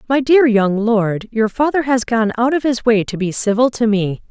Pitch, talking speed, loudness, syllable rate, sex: 230 Hz, 235 wpm, -16 LUFS, 4.8 syllables/s, female